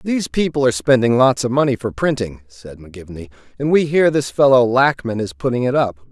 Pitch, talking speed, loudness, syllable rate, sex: 125 Hz, 205 wpm, -17 LUFS, 5.9 syllables/s, male